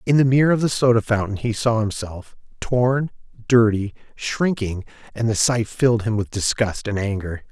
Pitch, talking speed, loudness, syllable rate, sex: 115 Hz, 175 wpm, -20 LUFS, 4.9 syllables/s, male